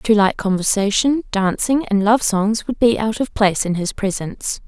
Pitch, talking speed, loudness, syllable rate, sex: 210 Hz, 195 wpm, -18 LUFS, 4.9 syllables/s, female